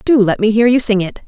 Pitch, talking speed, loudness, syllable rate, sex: 220 Hz, 330 wpm, -13 LUFS, 6.0 syllables/s, female